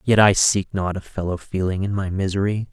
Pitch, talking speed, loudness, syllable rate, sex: 95 Hz, 220 wpm, -21 LUFS, 5.4 syllables/s, male